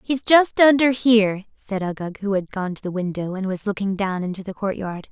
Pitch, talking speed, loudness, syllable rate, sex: 205 Hz, 235 wpm, -21 LUFS, 5.4 syllables/s, female